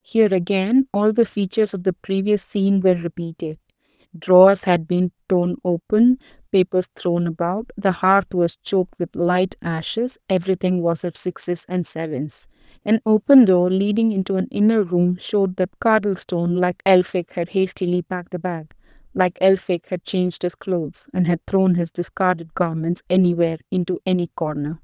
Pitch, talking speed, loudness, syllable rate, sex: 185 Hz, 155 wpm, -20 LUFS, 5.0 syllables/s, female